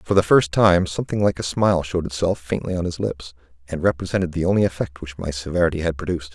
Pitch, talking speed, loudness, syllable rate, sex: 85 Hz, 215 wpm, -21 LUFS, 6.8 syllables/s, male